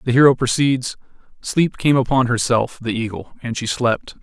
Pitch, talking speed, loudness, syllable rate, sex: 125 Hz, 170 wpm, -18 LUFS, 4.9 syllables/s, male